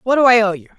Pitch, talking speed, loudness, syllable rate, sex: 225 Hz, 385 wpm, -14 LUFS, 8.2 syllables/s, female